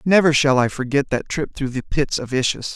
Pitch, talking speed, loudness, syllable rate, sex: 140 Hz, 240 wpm, -20 LUFS, 5.4 syllables/s, male